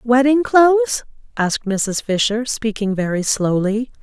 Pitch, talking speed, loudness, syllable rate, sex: 235 Hz, 120 wpm, -17 LUFS, 4.2 syllables/s, female